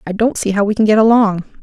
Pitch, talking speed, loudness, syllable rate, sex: 210 Hz, 295 wpm, -13 LUFS, 6.7 syllables/s, female